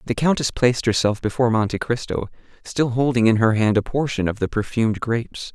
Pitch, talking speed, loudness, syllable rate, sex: 115 Hz, 195 wpm, -20 LUFS, 6.0 syllables/s, male